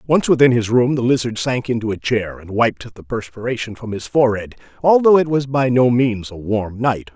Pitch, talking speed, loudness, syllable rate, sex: 120 Hz, 220 wpm, -18 LUFS, 5.2 syllables/s, male